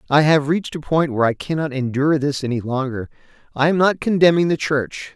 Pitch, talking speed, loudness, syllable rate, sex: 145 Hz, 210 wpm, -19 LUFS, 6.0 syllables/s, male